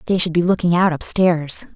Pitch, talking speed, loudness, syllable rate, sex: 170 Hz, 240 wpm, -17 LUFS, 5.4 syllables/s, female